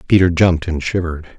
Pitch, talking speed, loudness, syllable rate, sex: 85 Hz, 175 wpm, -16 LUFS, 6.5 syllables/s, male